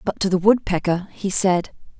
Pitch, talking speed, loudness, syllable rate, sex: 190 Hz, 180 wpm, -20 LUFS, 4.9 syllables/s, female